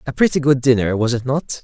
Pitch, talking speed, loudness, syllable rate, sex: 130 Hz, 255 wpm, -17 LUFS, 6.0 syllables/s, male